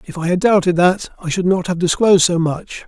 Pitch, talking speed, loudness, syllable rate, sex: 180 Hz, 250 wpm, -16 LUFS, 5.6 syllables/s, male